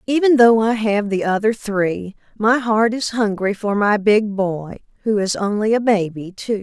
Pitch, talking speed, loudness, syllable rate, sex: 210 Hz, 190 wpm, -18 LUFS, 4.3 syllables/s, female